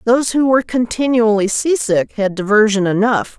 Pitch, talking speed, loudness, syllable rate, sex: 225 Hz, 140 wpm, -15 LUFS, 5.2 syllables/s, female